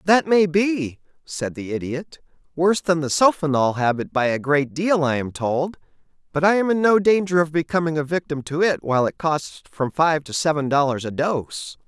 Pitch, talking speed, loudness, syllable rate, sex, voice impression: 155 Hz, 200 wpm, -21 LUFS, 5.0 syllables/s, male, masculine, adult-like, cool, sincere, friendly